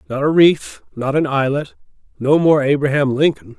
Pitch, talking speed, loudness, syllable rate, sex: 140 Hz, 165 wpm, -16 LUFS, 4.9 syllables/s, male